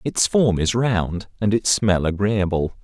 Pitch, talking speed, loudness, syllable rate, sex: 100 Hz, 170 wpm, -20 LUFS, 3.9 syllables/s, male